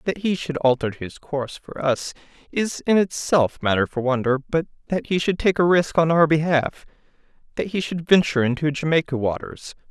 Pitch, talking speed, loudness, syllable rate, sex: 155 Hz, 180 wpm, -21 LUFS, 5.3 syllables/s, male